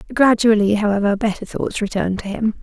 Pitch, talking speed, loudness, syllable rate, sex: 210 Hz, 160 wpm, -18 LUFS, 6.1 syllables/s, female